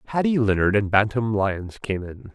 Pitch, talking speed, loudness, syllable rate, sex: 105 Hz, 180 wpm, -22 LUFS, 4.6 syllables/s, male